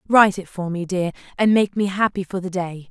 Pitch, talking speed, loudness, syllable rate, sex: 190 Hz, 250 wpm, -21 LUFS, 5.7 syllables/s, female